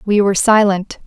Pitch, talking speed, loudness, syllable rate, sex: 200 Hz, 170 wpm, -14 LUFS, 5.5 syllables/s, female